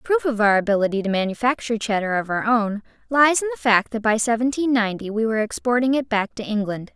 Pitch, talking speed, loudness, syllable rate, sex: 225 Hz, 215 wpm, -21 LUFS, 6.4 syllables/s, female